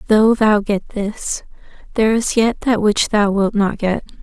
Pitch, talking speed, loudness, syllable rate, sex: 210 Hz, 185 wpm, -17 LUFS, 4.2 syllables/s, female